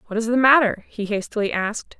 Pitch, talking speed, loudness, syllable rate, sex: 225 Hz, 210 wpm, -20 LUFS, 6.2 syllables/s, female